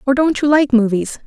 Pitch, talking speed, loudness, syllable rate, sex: 265 Hz, 240 wpm, -15 LUFS, 5.5 syllables/s, female